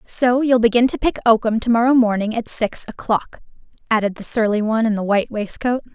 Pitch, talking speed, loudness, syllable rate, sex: 225 Hz, 200 wpm, -18 LUFS, 5.8 syllables/s, female